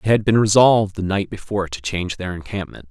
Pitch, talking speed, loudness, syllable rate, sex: 100 Hz, 225 wpm, -19 LUFS, 6.4 syllables/s, male